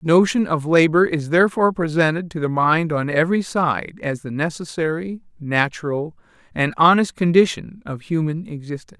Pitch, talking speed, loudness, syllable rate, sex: 165 Hz, 155 wpm, -19 LUFS, 5.3 syllables/s, male